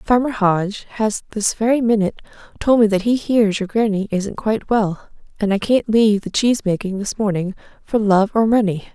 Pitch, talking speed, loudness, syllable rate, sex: 210 Hz, 195 wpm, -18 LUFS, 5.3 syllables/s, female